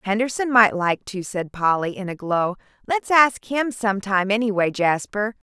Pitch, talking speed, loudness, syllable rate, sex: 210 Hz, 165 wpm, -21 LUFS, 4.9 syllables/s, female